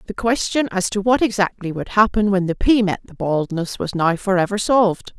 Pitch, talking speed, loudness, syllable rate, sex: 200 Hz, 220 wpm, -19 LUFS, 5.3 syllables/s, female